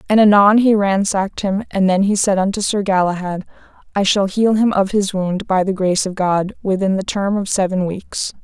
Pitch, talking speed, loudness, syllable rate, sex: 195 Hz, 215 wpm, -16 LUFS, 5.2 syllables/s, female